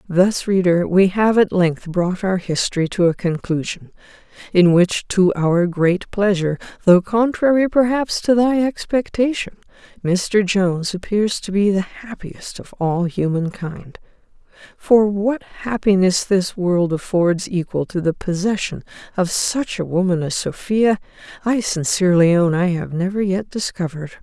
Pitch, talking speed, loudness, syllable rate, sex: 190 Hz, 145 wpm, -18 LUFS, 4.4 syllables/s, female